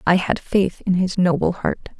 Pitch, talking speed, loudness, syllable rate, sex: 180 Hz, 210 wpm, -20 LUFS, 4.4 syllables/s, female